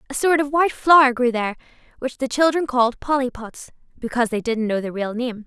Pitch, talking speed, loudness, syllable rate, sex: 255 Hz, 210 wpm, -20 LUFS, 6.2 syllables/s, female